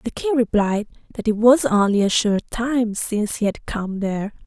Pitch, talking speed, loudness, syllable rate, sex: 220 Hz, 200 wpm, -20 LUFS, 4.9 syllables/s, female